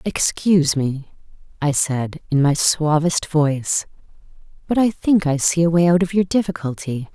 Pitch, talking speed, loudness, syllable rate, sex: 160 Hz, 160 wpm, -19 LUFS, 4.8 syllables/s, female